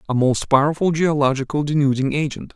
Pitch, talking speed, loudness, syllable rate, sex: 145 Hz, 140 wpm, -19 LUFS, 5.9 syllables/s, male